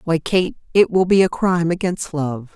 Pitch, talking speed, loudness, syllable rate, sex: 175 Hz, 210 wpm, -18 LUFS, 4.9 syllables/s, female